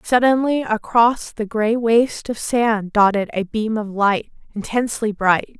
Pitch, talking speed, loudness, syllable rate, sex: 220 Hz, 150 wpm, -19 LUFS, 4.2 syllables/s, female